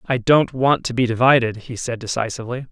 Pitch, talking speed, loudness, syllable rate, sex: 120 Hz, 200 wpm, -19 LUFS, 5.8 syllables/s, male